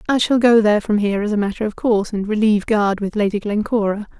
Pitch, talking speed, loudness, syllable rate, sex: 210 Hz, 245 wpm, -18 LUFS, 6.6 syllables/s, female